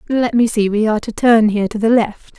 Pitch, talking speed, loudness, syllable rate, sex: 220 Hz, 250 wpm, -15 LUFS, 6.0 syllables/s, female